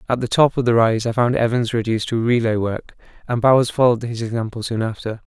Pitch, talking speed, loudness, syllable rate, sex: 115 Hz, 225 wpm, -19 LUFS, 6.3 syllables/s, male